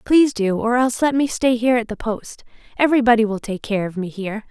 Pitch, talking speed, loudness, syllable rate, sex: 230 Hz, 240 wpm, -19 LUFS, 6.4 syllables/s, female